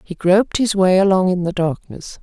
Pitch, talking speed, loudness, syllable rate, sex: 185 Hz, 215 wpm, -16 LUFS, 5.2 syllables/s, female